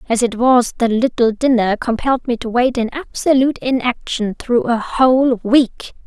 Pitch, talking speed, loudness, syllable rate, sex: 245 Hz, 170 wpm, -16 LUFS, 4.9 syllables/s, female